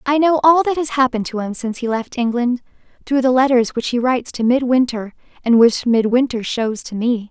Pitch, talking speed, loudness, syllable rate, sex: 245 Hz, 215 wpm, -17 LUFS, 5.6 syllables/s, female